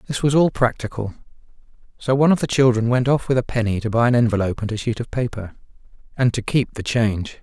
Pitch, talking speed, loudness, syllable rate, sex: 120 Hz, 225 wpm, -20 LUFS, 6.6 syllables/s, male